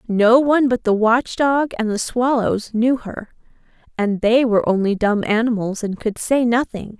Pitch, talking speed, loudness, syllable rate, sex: 230 Hz, 170 wpm, -18 LUFS, 4.5 syllables/s, female